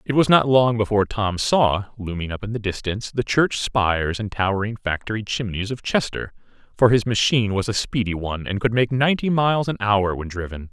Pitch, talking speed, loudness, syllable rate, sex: 110 Hz, 205 wpm, -21 LUFS, 5.7 syllables/s, male